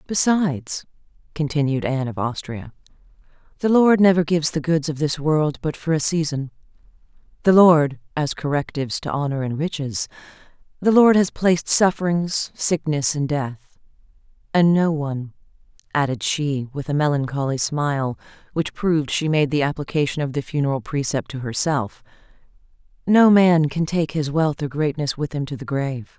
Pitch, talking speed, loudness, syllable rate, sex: 150 Hz, 150 wpm, -21 LUFS, 5.1 syllables/s, female